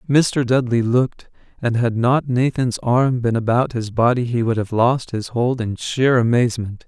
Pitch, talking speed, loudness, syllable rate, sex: 120 Hz, 185 wpm, -19 LUFS, 4.6 syllables/s, male